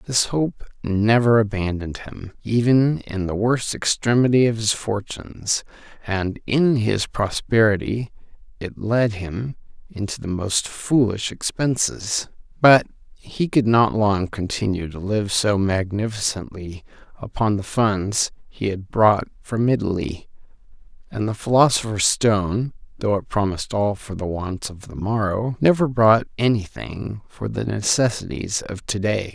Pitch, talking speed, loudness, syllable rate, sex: 105 Hz, 135 wpm, -21 LUFS, 4.2 syllables/s, male